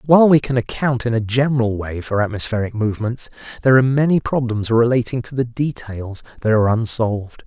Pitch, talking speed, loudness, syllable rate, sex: 120 Hz, 175 wpm, -18 LUFS, 6.0 syllables/s, male